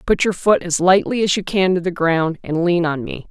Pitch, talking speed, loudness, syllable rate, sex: 180 Hz, 270 wpm, -17 LUFS, 5.1 syllables/s, female